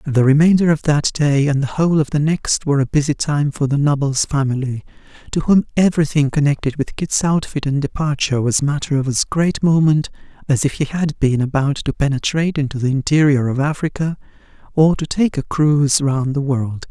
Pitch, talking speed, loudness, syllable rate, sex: 145 Hz, 195 wpm, -17 LUFS, 5.5 syllables/s, male